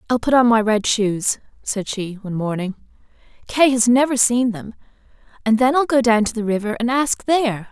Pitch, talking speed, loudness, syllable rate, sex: 230 Hz, 200 wpm, -18 LUFS, 5.3 syllables/s, female